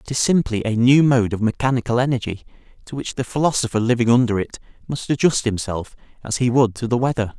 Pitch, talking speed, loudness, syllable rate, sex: 120 Hz, 205 wpm, -19 LUFS, 6.2 syllables/s, male